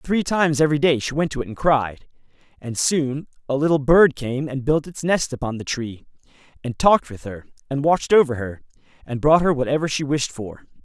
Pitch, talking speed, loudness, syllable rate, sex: 140 Hz, 210 wpm, -20 LUFS, 5.5 syllables/s, male